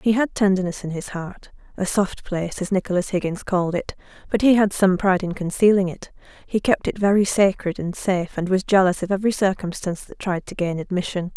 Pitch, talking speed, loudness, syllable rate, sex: 190 Hz, 205 wpm, -21 LUFS, 5.9 syllables/s, female